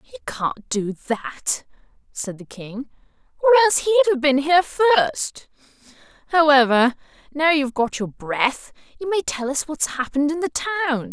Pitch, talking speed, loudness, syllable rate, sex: 290 Hz, 155 wpm, -20 LUFS, 4.6 syllables/s, female